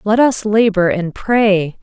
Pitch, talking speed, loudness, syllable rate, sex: 205 Hz, 165 wpm, -14 LUFS, 3.5 syllables/s, female